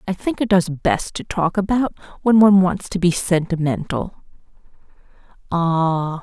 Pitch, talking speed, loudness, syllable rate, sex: 180 Hz, 135 wpm, -19 LUFS, 5.1 syllables/s, female